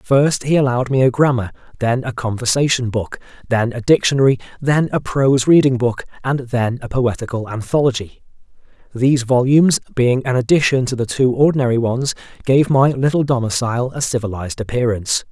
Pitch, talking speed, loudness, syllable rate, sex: 125 Hz, 155 wpm, -17 LUFS, 5.7 syllables/s, male